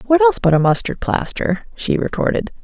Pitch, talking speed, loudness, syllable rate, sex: 190 Hz, 180 wpm, -17 LUFS, 5.5 syllables/s, female